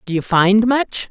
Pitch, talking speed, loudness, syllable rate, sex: 215 Hz, 215 wpm, -15 LUFS, 4.0 syllables/s, female